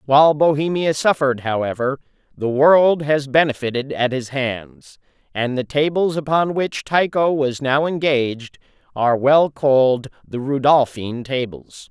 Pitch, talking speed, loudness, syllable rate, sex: 140 Hz, 130 wpm, -18 LUFS, 4.5 syllables/s, male